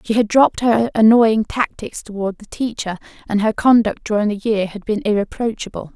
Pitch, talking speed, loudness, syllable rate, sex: 215 Hz, 180 wpm, -18 LUFS, 5.3 syllables/s, female